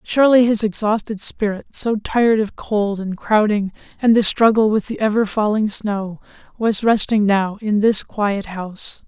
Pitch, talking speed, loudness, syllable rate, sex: 210 Hz, 165 wpm, -18 LUFS, 4.5 syllables/s, female